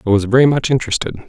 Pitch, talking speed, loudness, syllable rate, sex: 120 Hz, 235 wpm, -15 LUFS, 9.0 syllables/s, male